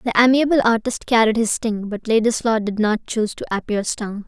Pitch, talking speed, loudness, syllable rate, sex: 225 Hz, 195 wpm, -19 LUFS, 5.6 syllables/s, female